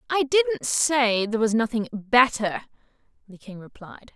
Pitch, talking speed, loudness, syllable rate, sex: 240 Hz, 145 wpm, -22 LUFS, 4.3 syllables/s, female